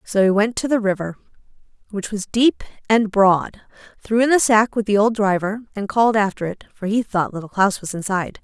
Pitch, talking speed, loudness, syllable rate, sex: 210 Hz, 215 wpm, -19 LUFS, 5.4 syllables/s, female